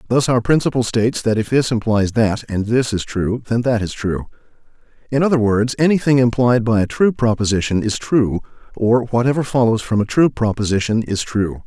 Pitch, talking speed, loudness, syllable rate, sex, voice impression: 115 Hz, 190 wpm, -17 LUFS, 5.3 syllables/s, male, masculine, very adult-like, slightly thick, fluent, cool, slightly intellectual, slightly calm, slightly kind